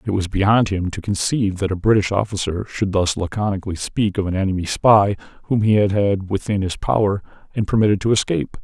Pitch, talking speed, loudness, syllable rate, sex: 100 Hz, 200 wpm, -19 LUFS, 5.9 syllables/s, male